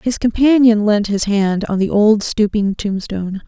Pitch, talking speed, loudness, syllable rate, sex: 210 Hz, 175 wpm, -15 LUFS, 4.4 syllables/s, female